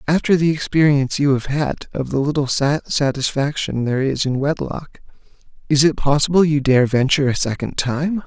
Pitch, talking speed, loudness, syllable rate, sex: 145 Hz, 165 wpm, -18 LUFS, 5.2 syllables/s, male